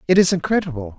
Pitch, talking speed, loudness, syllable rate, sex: 160 Hz, 185 wpm, -18 LUFS, 7.2 syllables/s, male